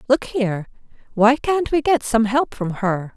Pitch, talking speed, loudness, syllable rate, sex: 240 Hz, 190 wpm, -19 LUFS, 4.4 syllables/s, female